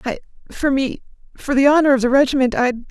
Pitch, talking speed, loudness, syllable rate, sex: 265 Hz, 205 wpm, -17 LUFS, 6.3 syllables/s, female